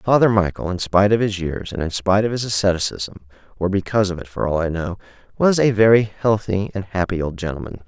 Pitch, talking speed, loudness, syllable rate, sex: 95 Hz, 220 wpm, -19 LUFS, 5.1 syllables/s, male